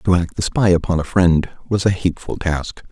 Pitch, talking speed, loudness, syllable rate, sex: 90 Hz, 225 wpm, -18 LUFS, 5.5 syllables/s, male